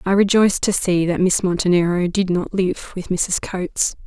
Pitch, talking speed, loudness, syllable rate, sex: 185 Hz, 190 wpm, -19 LUFS, 5.0 syllables/s, female